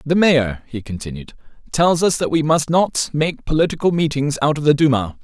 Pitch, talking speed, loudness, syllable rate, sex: 145 Hz, 195 wpm, -18 LUFS, 5.1 syllables/s, male